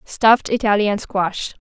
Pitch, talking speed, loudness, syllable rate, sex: 210 Hz, 110 wpm, -18 LUFS, 4.1 syllables/s, female